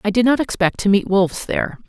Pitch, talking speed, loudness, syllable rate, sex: 210 Hz, 255 wpm, -18 LUFS, 6.4 syllables/s, female